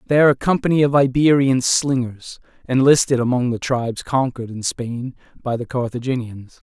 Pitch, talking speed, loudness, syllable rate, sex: 130 Hz, 150 wpm, -19 LUFS, 5.4 syllables/s, male